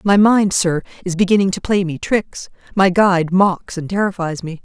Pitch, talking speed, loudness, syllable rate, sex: 185 Hz, 195 wpm, -16 LUFS, 5.0 syllables/s, female